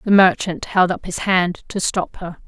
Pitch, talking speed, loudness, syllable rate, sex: 180 Hz, 220 wpm, -19 LUFS, 4.4 syllables/s, female